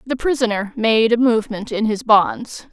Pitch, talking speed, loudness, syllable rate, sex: 225 Hz, 175 wpm, -17 LUFS, 4.7 syllables/s, female